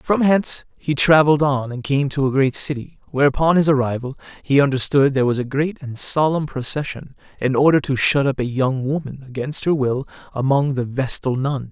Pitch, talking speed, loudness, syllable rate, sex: 140 Hz, 200 wpm, -19 LUFS, 5.5 syllables/s, male